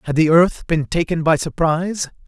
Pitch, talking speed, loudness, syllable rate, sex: 160 Hz, 185 wpm, -18 LUFS, 5.1 syllables/s, male